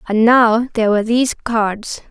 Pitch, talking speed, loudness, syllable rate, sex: 225 Hz, 170 wpm, -15 LUFS, 5.4 syllables/s, female